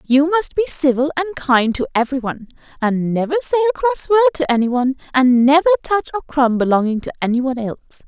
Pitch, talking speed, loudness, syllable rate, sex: 265 Hz, 185 wpm, -17 LUFS, 5.8 syllables/s, female